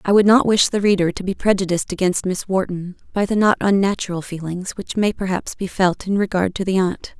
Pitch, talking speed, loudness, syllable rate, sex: 190 Hz, 225 wpm, -19 LUFS, 5.7 syllables/s, female